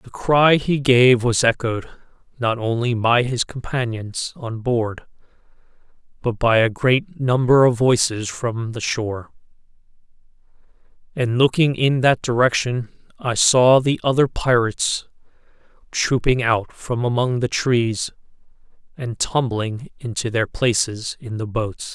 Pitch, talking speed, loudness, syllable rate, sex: 120 Hz, 130 wpm, -19 LUFS, 4.0 syllables/s, male